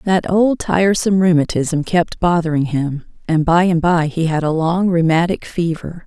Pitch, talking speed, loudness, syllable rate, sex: 170 Hz, 170 wpm, -16 LUFS, 4.7 syllables/s, female